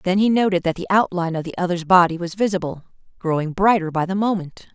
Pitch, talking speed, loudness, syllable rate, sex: 180 Hz, 215 wpm, -20 LUFS, 6.4 syllables/s, female